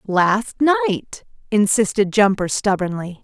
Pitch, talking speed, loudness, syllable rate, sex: 200 Hz, 95 wpm, -18 LUFS, 4.4 syllables/s, female